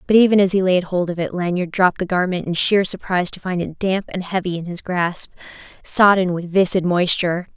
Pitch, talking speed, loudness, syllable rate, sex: 180 Hz, 220 wpm, -19 LUFS, 5.7 syllables/s, female